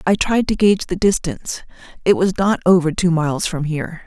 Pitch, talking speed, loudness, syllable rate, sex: 175 Hz, 205 wpm, -18 LUFS, 6.2 syllables/s, female